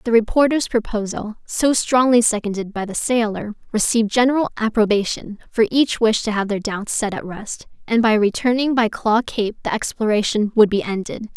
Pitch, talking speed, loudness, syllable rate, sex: 220 Hz, 175 wpm, -19 LUFS, 5.2 syllables/s, female